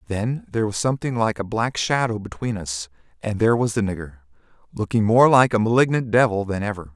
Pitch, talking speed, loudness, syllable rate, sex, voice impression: 110 Hz, 200 wpm, -21 LUFS, 6.1 syllables/s, male, masculine, middle-aged, tensed, slightly soft, clear, intellectual, calm, mature, friendly, reassuring, wild, lively, slightly kind